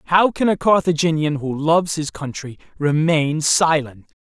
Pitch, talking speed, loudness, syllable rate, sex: 155 Hz, 140 wpm, -18 LUFS, 4.6 syllables/s, male